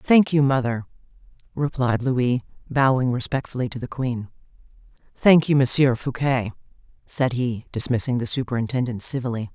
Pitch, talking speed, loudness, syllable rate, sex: 125 Hz, 125 wpm, -22 LUFS, 5.0 syllables/s, female